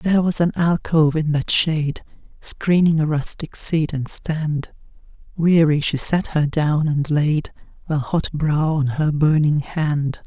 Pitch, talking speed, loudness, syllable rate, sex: 155 Hz, 160 wpm, -19 LUFS, 4.0 syllables/s, female